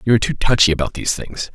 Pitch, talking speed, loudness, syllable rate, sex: 110 Hz, 270 wpm, -18 LUFS, 7.9 syllables/s, male